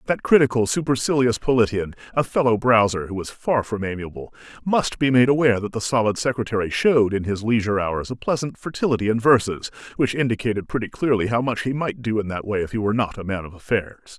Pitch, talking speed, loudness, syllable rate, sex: 115 Hz, 205 wpm, -21 LUFS, 6.2 syllables/s, male